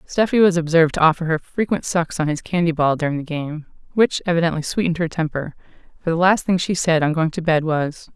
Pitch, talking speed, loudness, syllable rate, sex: 165 Hz, 230 wpm, -19 LUFS, 6.1 syllables/s, female